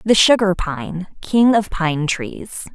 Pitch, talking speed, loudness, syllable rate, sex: 185 Hz, 155 wpm, -17 LUFS, 3.3 syllables/s, female